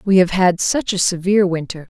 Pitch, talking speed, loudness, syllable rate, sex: 185 Hz, 210 wpm, -17 LUFS, 5.5 syllables/s, female